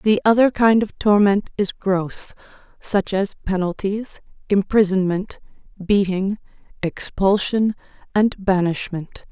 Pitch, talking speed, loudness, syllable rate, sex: 200 Hz, 90 wpm, -20 LUFS, 3.8 syllables/s, female